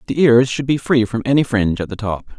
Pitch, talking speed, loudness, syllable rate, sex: 120 Hz, 275 wpm, -17 LUFS, 6.3 syllables/s, male